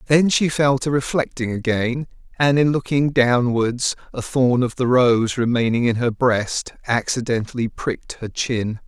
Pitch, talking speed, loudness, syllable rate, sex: 125 Hz, 155 wpm, -20 LUFS, 4.4 syllables/s, male